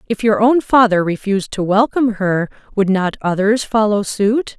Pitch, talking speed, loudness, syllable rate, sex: 210 Hz, 170 wpm, -16 LUFS, 4.9 syllables/s, female